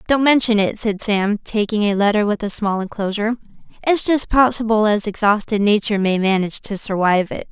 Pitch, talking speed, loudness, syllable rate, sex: 210 Hz, 185 wpm, -18 LUFS, 5.6 syllables/s, female